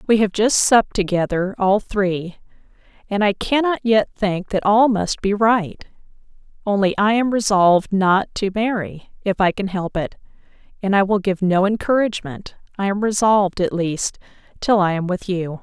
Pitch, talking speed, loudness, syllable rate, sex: 200 Hz, 170 wpm, -19 LUFS, 4.7 syllables/s, female